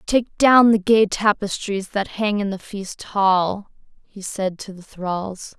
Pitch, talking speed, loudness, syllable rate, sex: 200 Hz, 170 wpm, -20 LUFS, 3.5 syllables/s, female